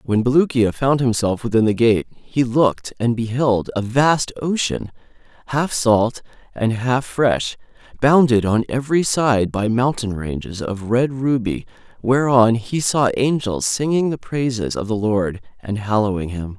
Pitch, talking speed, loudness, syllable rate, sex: 120 Hz, 150 wpm, -19 LUFS, 4.3 syllables/s, male